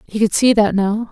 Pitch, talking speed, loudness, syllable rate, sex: 215 Hz, 270 wpm, -15 LUFS, 5.2 syllables/s, female